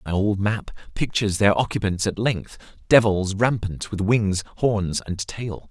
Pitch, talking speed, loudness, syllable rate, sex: 100 Hz, 145 wpm, -22 LUFS, 4.3 syllables/s, male